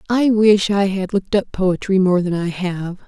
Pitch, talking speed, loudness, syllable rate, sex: 190 Hz, 215 wpm, -17 LUFS, 4.8 syllables/s, female